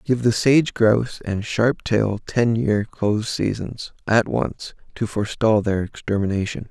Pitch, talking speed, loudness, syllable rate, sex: 110 Hz, 150 wpm, -21 LUFS, 4.2 syllables/s, male